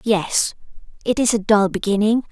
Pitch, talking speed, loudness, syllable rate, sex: 215 Hz, 155 wpm, -19 LUFS, 4.7 syllables/s, female